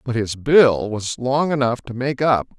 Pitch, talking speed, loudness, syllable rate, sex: 125 Hz, 210 wpm, -19 LUFS, 4.2 syllables/s, male